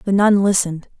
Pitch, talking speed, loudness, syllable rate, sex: 195 Hz, 180 wpm, -16 LUFS, 6.2 syllables/s, female